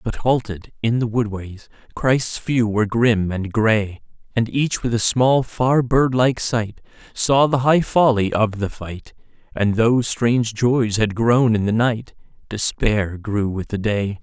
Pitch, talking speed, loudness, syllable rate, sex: 115 Hz, 175 wpm, -19 LUFS, 3.8 syllables/s, male